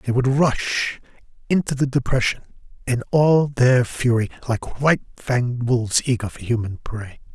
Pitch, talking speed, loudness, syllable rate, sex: 125 Hz, 145 wpm, -21 LUFS, 4.7 syllables/s, male